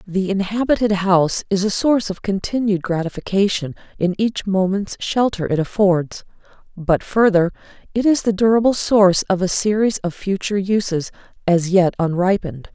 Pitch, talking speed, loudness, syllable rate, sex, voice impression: 195 Hz, 145 wpm, -18 LUFS, 5.1 syllables/s, female, feminine, adult-like, tensed, powerful, slightly hard, clear, fluent, intellectual, calm, slightly reassuring, elegant, lively, slightly strict, slightly sharp